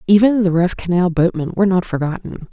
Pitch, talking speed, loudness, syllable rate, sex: 180 Hz, 190 wpm, -16 LUFS, 6.0 syllables/s, female